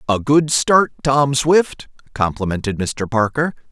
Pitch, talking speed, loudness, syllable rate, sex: 130 Hz, 130 wpm, -17 LUFS, 3.9 syllables/s, male